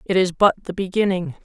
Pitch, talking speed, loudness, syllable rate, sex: 190 Hz, 210 wpm, -20 LUFS, 6.3 syllables/s, female